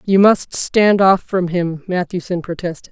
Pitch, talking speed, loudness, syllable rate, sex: 180 Hz, 165 wpm, -16 LUFS, 4.3 syllables/s, female